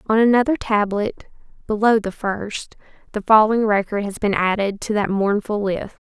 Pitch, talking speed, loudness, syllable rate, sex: 210 Hz, 160 wpm, -19 LUFS, 4.9 syllables/s, female